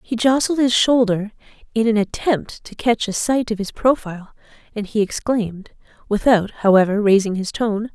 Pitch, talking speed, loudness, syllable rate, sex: 220 Hz, 165 wpm, -18 LUFS, 4.9 syllables/s, female